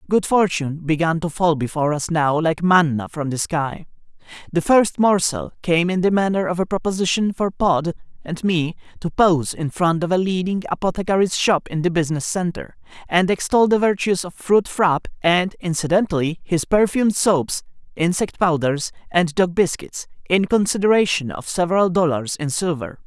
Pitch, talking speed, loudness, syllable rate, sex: 175 Hz, 165 wpm, -19 LUFS, 5.1 syllables/s, male